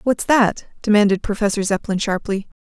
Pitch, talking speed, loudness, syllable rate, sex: 210 Hz, 135 wpm, -19 LUFS, 5.3 syllables/s, female